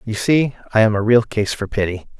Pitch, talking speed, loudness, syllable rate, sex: 110 Hz, 245 wpm, -18 LUFS, 5.5 syllables/s, male